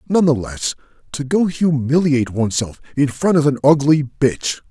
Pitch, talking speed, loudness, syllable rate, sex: 140 Hz, 140 wpm, -17 LUFS, 5.4 syllables/s, male